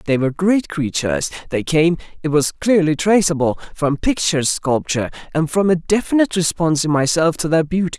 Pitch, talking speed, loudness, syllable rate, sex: 160 Hz, 165 wpm, -18 LUFS, 5.8 syllables/s, male